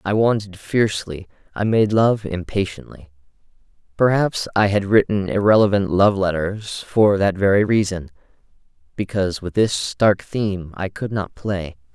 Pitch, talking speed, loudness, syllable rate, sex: 100 Hz, 135 wpm, -19 LUFS, 4.6 syllables/s, male